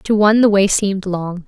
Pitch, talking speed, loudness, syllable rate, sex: 195 Hz, 245 wpm, -15 LUFS, 5.6 syllables/s, female